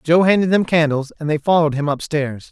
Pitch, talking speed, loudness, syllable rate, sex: 155 Hz, 215 wpm, -17 LUFS, 6.0 syllables/s, male